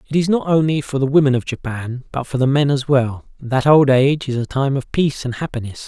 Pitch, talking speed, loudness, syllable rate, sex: 135 Hz, 255 wpm, -18 LUFS, 5.8 syllables/s, male